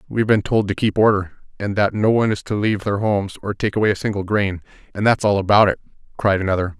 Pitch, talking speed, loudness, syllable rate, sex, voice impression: 100 Hz, 245 wpm, -19 LUFS, 6.9 syllables/s, male, masculine, middle-aged, thick, slightly muffled, slightly calm, slightly wild